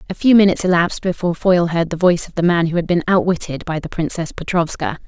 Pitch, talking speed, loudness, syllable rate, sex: 175 Hz, 235 wpm, -17 LUFS, 6.9 syllables/s, female